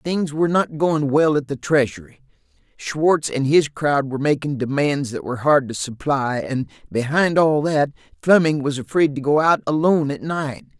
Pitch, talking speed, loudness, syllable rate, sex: 145 Hz, 185 wpm, -20 LUFS, 4.9 syllables/s, male